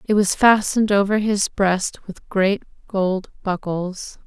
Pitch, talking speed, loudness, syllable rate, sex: 195 Hz, 140 wpm, -20 LUFS, 3.7 syllables/s, female